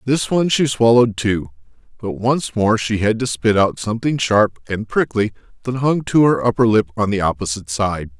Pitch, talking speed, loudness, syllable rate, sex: 110 Hz, 200 wpm, -18 LUFS, 5.3 syllables/s, male